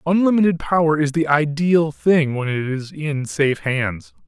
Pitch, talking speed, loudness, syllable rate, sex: 150 Hz, 170 wpm, -19 LUFS, 4.5 syllables/s, male